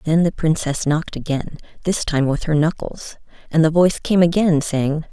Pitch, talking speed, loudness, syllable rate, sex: 160 Hz, 190 wpm, -19 LUFS, 5.1 syllables/s, female